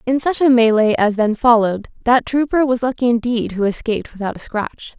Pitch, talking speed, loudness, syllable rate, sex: 235 Hz, 205 wpm, -17 LUFS, 5.6 syllables/s, female